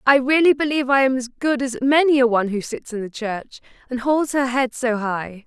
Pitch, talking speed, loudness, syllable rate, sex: 255 Hz, 240 wpm, -19 LUFS, 5.4 syllables/s, female